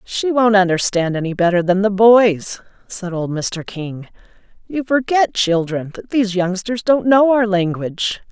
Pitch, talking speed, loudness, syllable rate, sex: 200 Hz, 160 wpm, -16 LUFS, 4.4 syllables/s, female